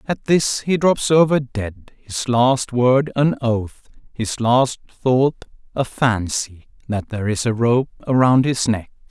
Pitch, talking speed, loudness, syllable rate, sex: 125 Hz, 160 wpm, -19 LUFS, 3.7 syllables/s, male